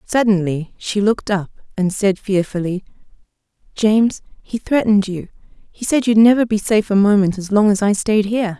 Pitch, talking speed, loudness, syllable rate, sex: 205 Hz, 175 wpm, -17 LUFS, 5.4 syllables/s, female